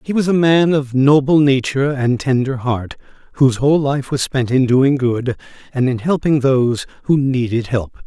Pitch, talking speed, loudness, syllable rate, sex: 135 Hz, 185 wpm, -16 LUFS, 4.9 syllables/s, male